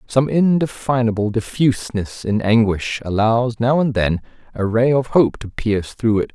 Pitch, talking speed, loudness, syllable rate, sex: 115 Hz, 160 wpm, -18 LUFS, 4.6 syllables/s, male